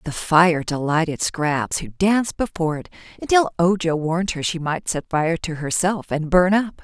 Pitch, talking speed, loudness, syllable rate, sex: 170 Hz, 185 wpm, -20 LUFS, 4.8 syllables/s, female